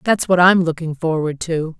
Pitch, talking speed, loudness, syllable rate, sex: 165 Hz, 200 wpm, -17 LUFS, 4.8 syllables/s, female